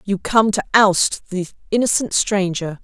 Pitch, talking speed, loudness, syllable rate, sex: 200 Hz, 150 wpm, -18 LUFS, 4.2 syllables/s, female